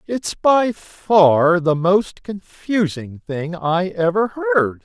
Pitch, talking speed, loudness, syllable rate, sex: 180 Hz, 125 wpm, -18 LUFS, 2.8 syllables/s, male